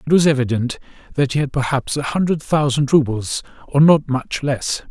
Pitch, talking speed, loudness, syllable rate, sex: 140 Hz, 185 wpm, -18 LUFS, 5.1 syllables/s, male